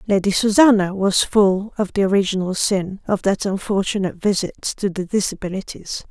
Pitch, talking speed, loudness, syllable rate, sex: 195 Hz, 145 wpm, -19 LUFS, 5.1 syllables/s, female